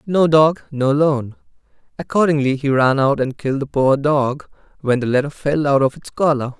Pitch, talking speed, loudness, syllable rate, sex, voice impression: 140 Hz, 190 wpm, -17 LUFS, 5.0 syllables/s, male, slightly masculine, slightly adult-like, refreshing, friendly, slightly kind